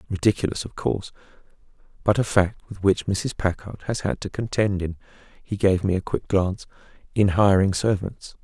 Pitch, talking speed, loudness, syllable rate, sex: 100 Hz, 155 wpm, -23 LUFS, 5.4 syllables/s, male